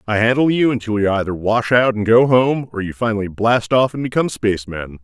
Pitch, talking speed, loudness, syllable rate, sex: 115 Hz, 225 wpm, -17 LUFS, 5.8 syllables/s, male